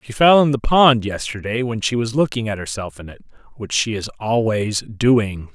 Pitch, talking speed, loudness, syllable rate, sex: 115 Hz, 205 wpm, -18 LUFS, 4.9 syllables/s, male